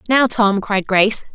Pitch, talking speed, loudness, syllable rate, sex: 210 Hz, 180 wpm, -16 LUFS, 4.6 syllables/s, female